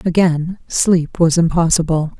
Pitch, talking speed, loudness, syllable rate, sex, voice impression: 165 Hz, 110 wpm, -15 LUFS, 4.0 syllables/s, female, feminine, gender-neutral, slightly young, slightly adult-like, slightly thin, relaxed, slightly weak, slightly dark, very soft, slightly muffled, very fluent, very cute, intellectual, slightly refreshing, sincere, very calm, very friendly, very reassuring, slightly unique, very elegant, very sweet, slightly lively, very kind, slightly modest, light